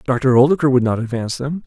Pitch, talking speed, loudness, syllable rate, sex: 135 Hz, 215 wpm, -17 LUFS, 6.6 syllables/s, male